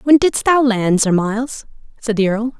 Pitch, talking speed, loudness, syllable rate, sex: 230 Hz, 210 wpm, -16 LUFS, 4.7 syllables/s, female